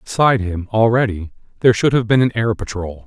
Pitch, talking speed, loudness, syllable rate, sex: 110 Hz, 195 wpm, -17 LUFS, 6.0 syllables/s, male